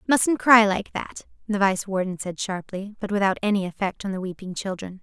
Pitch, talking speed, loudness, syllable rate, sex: 195 Hz, 205 wpm, -23 LUFS, 5.2 syllables/s, female